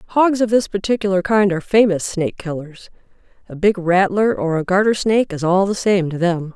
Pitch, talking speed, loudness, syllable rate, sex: 190 Hz, 190 wpm, -17 LUFS, 5.4 syllables/s, female